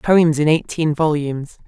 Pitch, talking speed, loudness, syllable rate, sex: 155 Hz, 145 wpm, -17 LUFS, 4.5 syllables/s, female